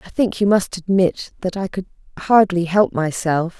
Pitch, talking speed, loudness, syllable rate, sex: 185 Hz, 185 wpm, -18 LUFS, 4.7 syllables/s, female